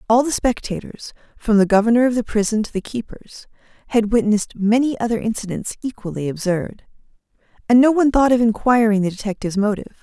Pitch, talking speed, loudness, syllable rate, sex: 220 Hz, 170 wpm, -18 LUFS, 6.2 syllables/s, female